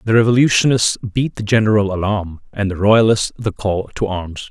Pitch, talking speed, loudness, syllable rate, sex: 105 Hz, 175 wpm, -16 LUFS, 5.1 syllables/s, male